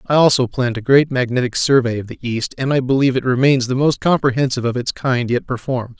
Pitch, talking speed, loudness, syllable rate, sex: 130 Hz, 230 wpm, -17 LUFS, 6.4 syllables/s, male